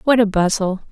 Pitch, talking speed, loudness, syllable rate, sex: 205 Hz, 195 wpm, -17 LUFS, 5.4 syllables/s, female